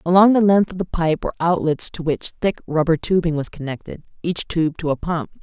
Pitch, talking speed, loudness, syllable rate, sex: 165 Hz, 220 wpm, -20 LUFS, 5.5 syllables/s, female